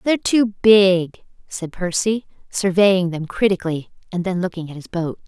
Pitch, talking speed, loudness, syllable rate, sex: 185 Hz, 160 wpm, -19 LUFS, 4.7 syllables/s, female